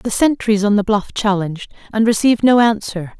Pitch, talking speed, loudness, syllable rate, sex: 210 Hz, 190 wpm, -16 LUFS, 5.5 syllables/s, female